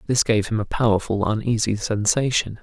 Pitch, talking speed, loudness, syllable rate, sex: 110 Hz, 160 wpm, -21 LUFS, 5.4 syllables/s, male